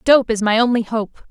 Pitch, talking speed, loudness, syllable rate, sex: 230 Hz, 230 wpm, -17 LUFS, 5.1 syllables/s, female